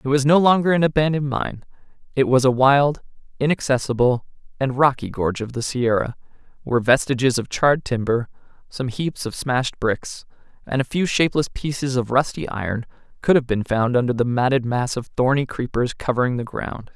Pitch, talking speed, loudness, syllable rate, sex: 130 Hz, 175 wpm, -21 LUFS, 5.5 syllables/s, male